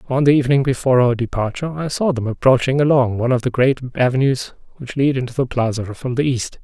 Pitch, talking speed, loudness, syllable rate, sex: 130 Hz, 215 wpm, -18 LUFS, 6.5 syllables/s, male